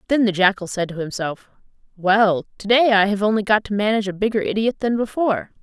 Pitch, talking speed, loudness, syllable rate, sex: 210 Hz, 215 wpm, -19 LUFS, 6.1 syllables/s, female